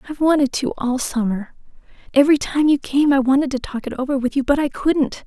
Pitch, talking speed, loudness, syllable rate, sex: 270 Hz, 205 wpm, -19 LUFS, 6.1 syllables/s, female